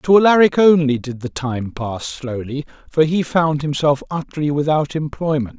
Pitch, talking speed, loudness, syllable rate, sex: 145 Hz, 160 wpm, -18 LUFS, 4.8 syllables/s, male